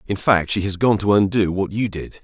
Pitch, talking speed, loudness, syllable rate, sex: 100 Hz, 270 wpm, -19 LUFS, 5.3 syllables/s, male